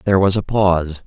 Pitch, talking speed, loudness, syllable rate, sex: 95 Hz, 225 wpm, -16 LUFS, 6.3 syllables/s, male